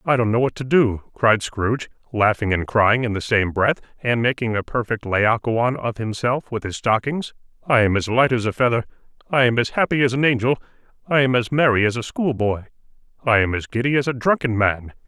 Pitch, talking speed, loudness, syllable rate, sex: 120 Hz, 215 wpm, -20 LUFS, 5.5 syllables/s, male